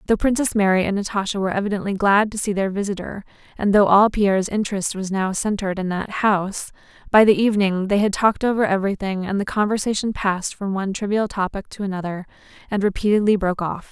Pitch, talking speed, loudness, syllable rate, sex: 200 Hz, 195 wpm, -20 LUFS, 6.4 syllables/s, female